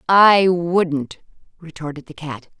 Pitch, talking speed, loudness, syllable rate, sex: 165 Hz, 115 wpm, -16 LUFS, 3.5 syllables/s, female